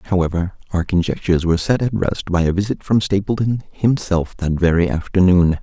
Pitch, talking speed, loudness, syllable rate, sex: 95 Hz, 170 wpm, -18 LUFS, 5.5 syllables/s, male